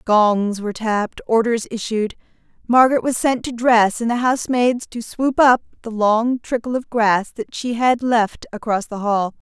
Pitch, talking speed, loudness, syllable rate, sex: 230 Hz, 175 wpm, -18 LUFS, 4.5 syllables/s, female